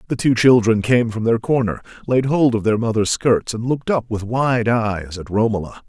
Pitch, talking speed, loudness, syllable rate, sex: 115 Hz, 215 wpm, -18 LUFS, 5.0 syllables/s, male